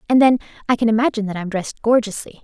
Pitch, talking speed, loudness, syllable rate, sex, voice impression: 225 Hz, 220 wpm, -19 LUFS, 7.7 syllables/s, female, very feminine, slightly young, thin, tensed, slightly weak, slightly dark, very hard, very clear, very fluent, slightly raspy, very cute, very intellectual, very refreshing, sincere, calm, very friendly, reassuring, very unique, very elegant, slightly wild, very sweet, lively, strict, slightly intense, slightly sharp, very light